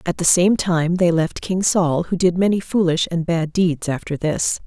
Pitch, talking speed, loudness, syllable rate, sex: 175 Hz, 220 wpm, -19 LUFS, 4.4 syllables/s, female